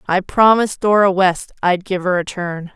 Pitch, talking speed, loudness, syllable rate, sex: 190 Hz, 195 wpm, -16 LUFS, 4.8 syllables/s, female